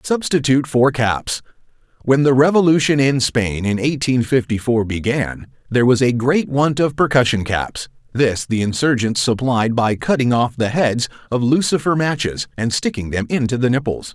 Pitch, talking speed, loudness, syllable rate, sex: 125 Hz, 160 wpm, -17 LUFS, 4.8 syllables/s, male